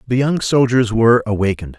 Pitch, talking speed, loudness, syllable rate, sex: 115 Hz, 170 wpm, -15 LUFS, 6.4 syllables/s, male